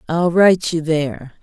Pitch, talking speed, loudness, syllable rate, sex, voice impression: 165 Hz, 170 wpm, -16 LUFS, 5.1 syllables/s, female, feminine, slightly gender-neutral, very adult-like, middle-aged, slightly thin, slightly tensed, slightly powerful, slightly bright, hard, slightly muffled, slightly fluent, slightly raspy, cool, slightly intellectual, slightly refreshing, sincere, very calm, friendly, slightly reassuring, slightly unique, wild, slightly lively, strict